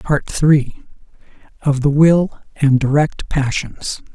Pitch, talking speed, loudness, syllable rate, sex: 145 Hz, 115 wpm, -16 LUFS, 3.3 syllables/s, male